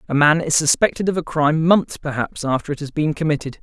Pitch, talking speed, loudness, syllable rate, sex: 155 Hz, 230 wpm, -19 LUFS, 6.1 syllables/s, male